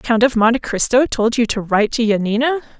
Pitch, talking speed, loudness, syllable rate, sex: 235 Hz, 235 wpm, -16 LUFS, 6.2 syllables/s, female